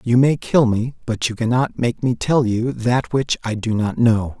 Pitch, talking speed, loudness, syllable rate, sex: 120 Hz, 230 wpm, -19 LUFS, 4.4 syllables/s, male